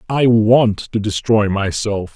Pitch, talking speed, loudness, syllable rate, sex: 105 Hz, 140 wpm, -16 LUFS, 3.6 syllables/s, male